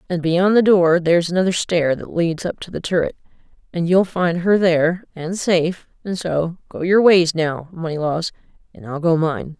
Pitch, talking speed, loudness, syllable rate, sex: 170 Hz, 175 wpm, -18 LUFS, 4.8 syllables/s, female